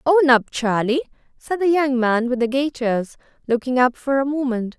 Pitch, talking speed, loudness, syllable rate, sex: 260 Hz, 190 wpm, -20 LUFS, 4.8 syllables/s, female